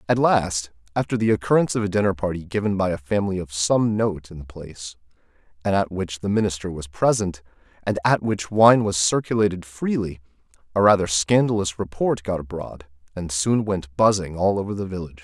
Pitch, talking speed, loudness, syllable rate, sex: 95 Hz, 185 wpm, -22 LUFS, 5.7 syllables/s, male